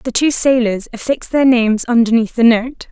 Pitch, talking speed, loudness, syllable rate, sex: 240 Hz, 185 wpm, -14 LUFS, 5.3 syllables/s, female